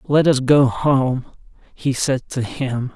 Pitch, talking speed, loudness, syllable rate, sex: 135 Hz, 165 wpm, -19 LUFS, 3.4 syllables/s, male